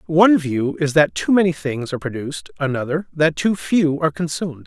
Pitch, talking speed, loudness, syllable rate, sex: 150 Hz, 195 wpm, -19 LUFS, 5.7 syllables/s, male